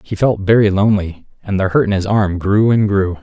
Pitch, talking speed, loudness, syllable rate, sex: 100 Hz, 240 wpm, -15 LUFS, 5.4 syllables/s, male